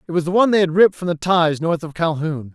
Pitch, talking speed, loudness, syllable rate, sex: 170 Hz, 305 wpm, -18 LUFS, 6.7 syllables/s, male